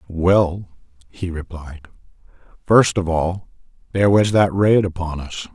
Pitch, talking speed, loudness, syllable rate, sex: 90 Hz, 130 wpm, -18 LUFS, 4.0 syllables/s, male